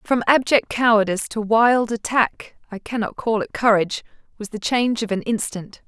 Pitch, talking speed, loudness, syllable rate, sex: 220 Hz, 155 wpm, -20 LUFS, 5.1 syllables/s, female